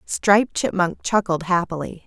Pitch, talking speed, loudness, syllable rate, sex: 185 Hz, 115 wpm, -20 LUFS, 4.7 syllables/s, female